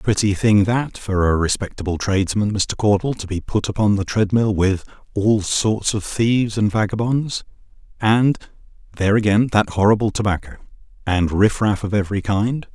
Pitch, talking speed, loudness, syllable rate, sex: 105 Hz, 145 wpm, -19 LUFS, 5.0 syllables/s, male